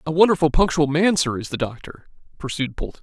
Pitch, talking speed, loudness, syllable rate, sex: 155 Hz, 200 wpm, -20 LUFS, 6.2 syllables/s, male